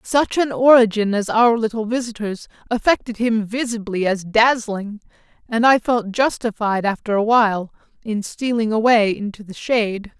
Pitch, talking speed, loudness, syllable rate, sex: 220 Hz, 145 wpm, -18 LUFS, 4.7 syllables/s, male